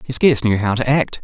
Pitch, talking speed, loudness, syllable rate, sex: 120 Hz, 290 wpm, -16 LUFS, 6.2 syllables/s, male